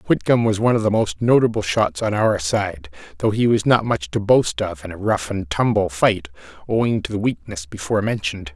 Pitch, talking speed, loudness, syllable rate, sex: 110 Hz, 215 wpm, -20 LUFS, 5.4 syllables/s, male